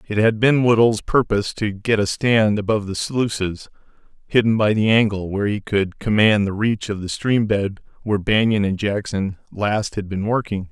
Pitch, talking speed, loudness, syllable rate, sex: 105 Hz, 190 wpm, -19 LUFS, 5.0 syllables/s, male